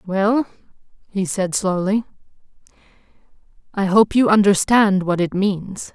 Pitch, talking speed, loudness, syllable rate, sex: 195 Hz, 110 wpm, -18 LUFS, 4.0 syllables/s, female